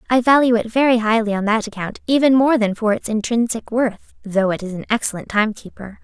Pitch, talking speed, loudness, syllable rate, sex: 225 Hz, 220 wpm, -18 LUFS, 5.7 syllables/s, female